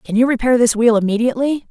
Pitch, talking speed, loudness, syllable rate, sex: 240 Hz, 210 wpm, -15 LUFS, 6.9 syllables/s, female